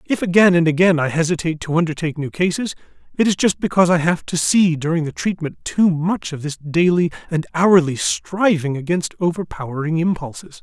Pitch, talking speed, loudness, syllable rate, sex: 170 Hz, 180 wpm, -18 LUFS, 5.7 syllables/s, male